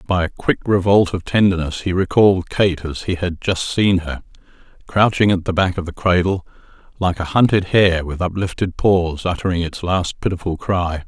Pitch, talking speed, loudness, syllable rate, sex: 90 Hz, 185 wpm, -18 LUFS, 5.0 syllables/s, male